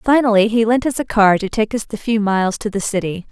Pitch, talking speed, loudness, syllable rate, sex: 215 Hz, 270 wpm, -17 LUFS, 5.9 syllables/s, female